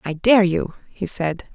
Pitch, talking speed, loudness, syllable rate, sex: 185 Hz, 195 wpm, -20 LUFS, 4.0 syllables/s, female